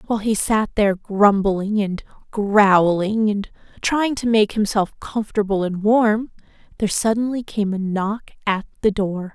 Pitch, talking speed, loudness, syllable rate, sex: 210 Hz, 150 wpm, -20 LUFS, 4.4 syllables/s, female